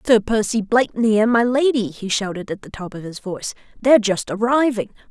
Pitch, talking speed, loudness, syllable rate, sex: 220 Hz, 200 wpm, -19 LUFS, 5.8 syllables/s, female